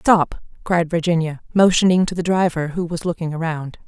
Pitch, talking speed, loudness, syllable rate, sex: 170 Hz, 170 wpm, -19 LUFS, 5.3 syllables/s, female